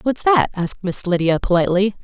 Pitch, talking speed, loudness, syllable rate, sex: 200 Hz, 175 wpm, -18 LUFS, 6.0 syllables/s, female